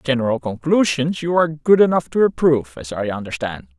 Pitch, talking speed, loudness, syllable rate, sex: 135 Hz, 190 wpm, -18 LUFS, 6.3 syllables/s, male